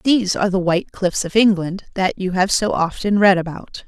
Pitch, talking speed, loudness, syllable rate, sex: 190 Hz, 215 wpm, -18 LUFS, 5.6 syllables/s, female